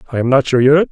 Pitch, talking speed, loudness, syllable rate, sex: 135 Hz, 330 wpm, -13 LUFS, 7.6 syllables/s, male